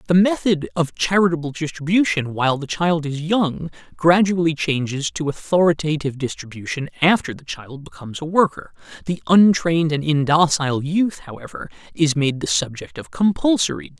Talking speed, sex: 145 wpm, male